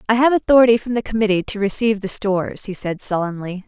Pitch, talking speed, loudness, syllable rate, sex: 210 Hz, 210 wpm, -18 LUFS, 6.6 syllables/s, female